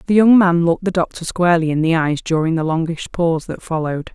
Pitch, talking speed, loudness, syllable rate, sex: 170 Hz, 230 wpm, -17 LUFS, 6.3 syllables/s, female